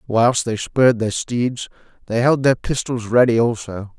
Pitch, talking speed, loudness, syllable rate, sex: 120 Hz, 165 wpm, -18 LUFS, 4.4 syllables/s, male